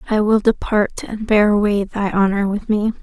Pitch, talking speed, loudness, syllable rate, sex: 210 Hz, 200 wpm, -17 LUFS, 5.0 syllables/s, female